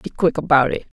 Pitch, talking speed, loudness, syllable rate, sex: 160 Hz, 245 wpm, -18 LUFS, 6.3 syllables/s, female